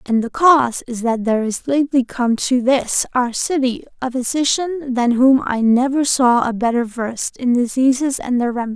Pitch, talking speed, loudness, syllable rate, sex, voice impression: 255 Hz, 190 wpm, -17 LUFS, 5.1 syllables/s, female, feminine, adult-like, tensed, bright, soft, friendly, reassuring, slightly unique, elegant, lively, kind